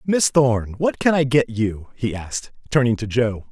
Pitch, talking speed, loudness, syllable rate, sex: 125 Hz, 205 wpm, -20 LUFS, 4.5 syllables/s, male